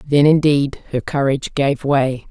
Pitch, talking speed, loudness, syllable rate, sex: 140 Hz, 155 wpm, -17 LUFS, 4.4 syllables/s, female